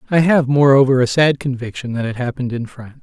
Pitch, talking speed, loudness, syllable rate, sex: 130 Hz, 220 wpm, -16 LUFS, 6.4 syllables/s, male